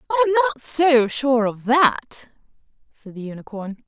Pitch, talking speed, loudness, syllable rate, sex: 260 Hz, 140 wpm, -18 LUFS, 6.9 syllables/s, female